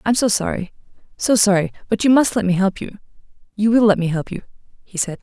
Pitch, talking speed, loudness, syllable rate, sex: 200 Hz, 205 wpm, -18 LUFS, 6.2 syllables/s, female